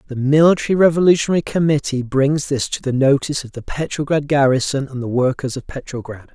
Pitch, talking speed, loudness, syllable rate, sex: 140 Hz, 170 wpm, -17 LUFS, 6.1 syllables/s, male